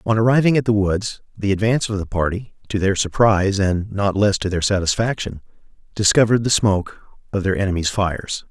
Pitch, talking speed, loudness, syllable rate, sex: 100 Hz, 185 wpm, -19 LUFS, 6.0 syllables/s, male